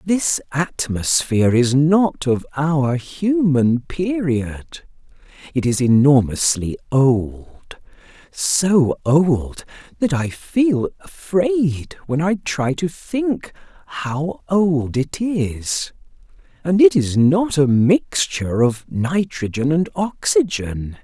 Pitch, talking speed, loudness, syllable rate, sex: 155 Hz, 100 wpm, -18 LUFS, 3.0 syllables/s, male